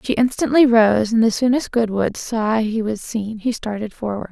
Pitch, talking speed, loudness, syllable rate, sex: 225 Hz, 210 wpm, -19 LUFS, 4.8 syllables/s, female